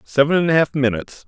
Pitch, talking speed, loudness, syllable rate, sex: 135 Hz, 235 wpm, -17 LUFS, 6.8 syllables/s, male